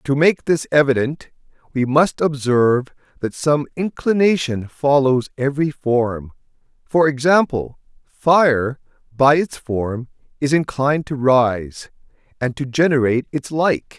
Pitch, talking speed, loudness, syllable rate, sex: 140 Hz, 120 wpm, -18 LUFS, 4.0 syllables/s, male